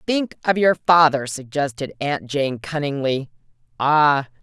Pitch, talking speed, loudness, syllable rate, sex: 145 Hz, 110 wpm, -20 LUFS, 4.3 syllables/s, female